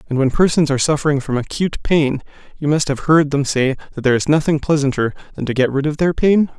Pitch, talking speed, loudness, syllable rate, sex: 145 Hz, 235 wpm, -17 LUFS, 6.4 syllables/s, male